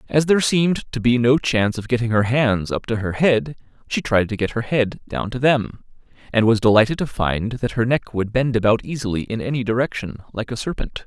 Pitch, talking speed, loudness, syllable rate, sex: 120 Hz, 230 wpm, -20 LUFS, 5.5 syllables/s, male